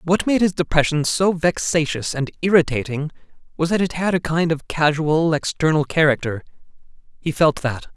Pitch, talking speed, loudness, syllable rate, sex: 160 Hz, 150 wpm, -19 LUFS, 5.1 syllables/s, male